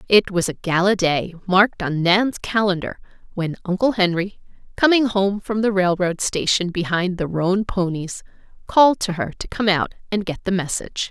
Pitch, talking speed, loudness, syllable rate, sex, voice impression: 190 Hz, 175 wpm, -20 LUFS, 4.9 syllables/s, female, feminine, middle-aged, tensed, powerful, bright, clear, fluent, intellectual, friendly, lively, slightly sharp